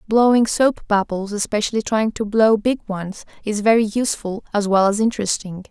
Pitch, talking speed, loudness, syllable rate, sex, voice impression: 210 Hz, 170 wpm, -19 LUFS, 5.2 syllables/s, female, feminine, slightly adult-like, slightly fluent, sincere, slightly friendly